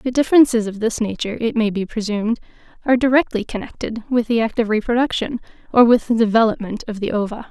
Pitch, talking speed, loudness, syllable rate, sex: 225 Hz, 190 wpm, -19 LUFS, 6.6 syllables/s, female